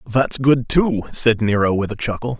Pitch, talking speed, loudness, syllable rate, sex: 120 Hz, 200 wpm, -18 LUFS, 5.0 syllables/s, male